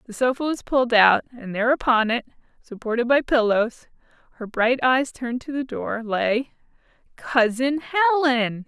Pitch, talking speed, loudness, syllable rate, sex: 245 Hz, 145 wpm, -21 LUFS, 4.7 syllables/s, female